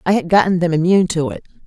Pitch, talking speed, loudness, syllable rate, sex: 175 Hz, 250 wpm, -16 LUFS, 7.5 syllables/s, female